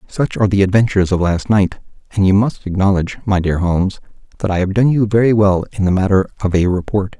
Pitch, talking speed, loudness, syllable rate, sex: 100 Hz, 225 wpm, -15 LUFS, 6.3 syllables/s, male